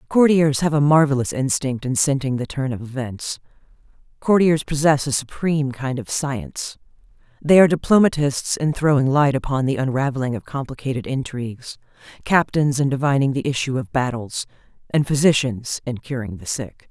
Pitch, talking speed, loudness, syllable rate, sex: 135 Hz, 155 wpm, -20 LUFS, 5.3 syllables/s, female